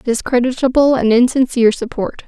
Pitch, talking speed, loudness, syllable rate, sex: 245 Hz, 105 wpm, -14 LUFS, 5.6 syllables/s, female